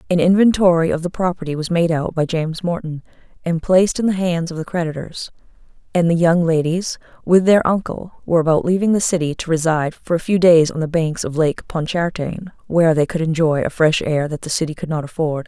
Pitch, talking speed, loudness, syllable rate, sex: 165 Hz, 215 wpm, -18 LUFS, 5.8 syllables/s, female